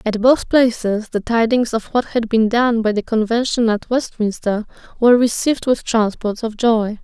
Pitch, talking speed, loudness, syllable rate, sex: 230 Hz, 180 wpm, -17 LUFS, 4.7 syllables/s, female